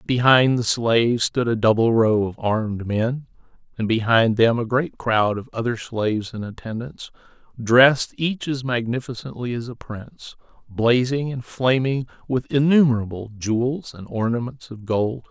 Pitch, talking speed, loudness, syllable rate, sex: 120 Hz, 150 wpm, -21 LUFS, 4.6 syllables/s, male